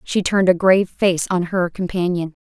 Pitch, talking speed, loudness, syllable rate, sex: 180 Hz, 200 wpm, -18 LUFS, 5.4 syllables/s, female